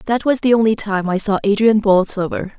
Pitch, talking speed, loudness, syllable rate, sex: 210 Hz, 210 wpm, -16 LUFS, 5.5 syllables/s, female